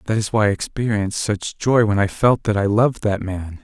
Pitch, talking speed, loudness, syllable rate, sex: 105 Hz, 245 wpm, -19 LUFS, 5.5 syllables/s, male